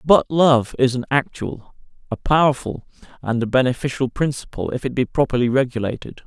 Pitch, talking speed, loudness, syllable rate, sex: 130 Hz, 155 wpm, -20 LUFS, 5.4 syllables/s, male